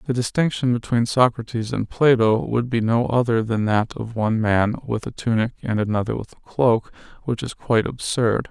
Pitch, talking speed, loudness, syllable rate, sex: 115 Hz, 190 wpm, -21 LUFS, 5.3 syllables/s, male